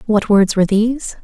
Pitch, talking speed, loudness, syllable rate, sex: 210 Hz, 195 wpm, -15 LUFS, 5.8 syllables/s, female